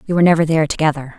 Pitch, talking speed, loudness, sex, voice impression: 160 Hz, 255 wpm, -15 LUFS, female, feminine, adult-like, slightly hard, fluent, raspy, intellectual, calm, slightly elegant, slightly strict, slightly sharp